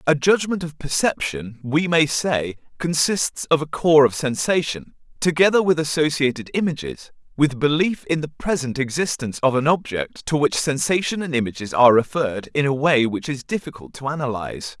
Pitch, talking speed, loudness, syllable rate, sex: 145 Hz, 165 wpm, -20 LUFS, 5.2 syllables/s, male